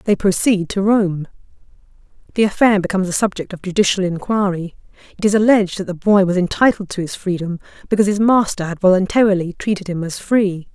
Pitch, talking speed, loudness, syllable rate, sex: 190 Hz, 180 wpm, -17 LUFS, 6.1 syllables/s, female